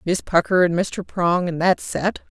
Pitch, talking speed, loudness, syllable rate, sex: 175 Hz, 200 wpm, -20 LUFS, 4.2 syllables/s, female